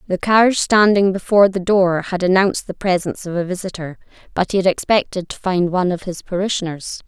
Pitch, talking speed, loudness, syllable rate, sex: 185 Hz, 195 wpm, -17 LUFS, 6.2 syllables/s, female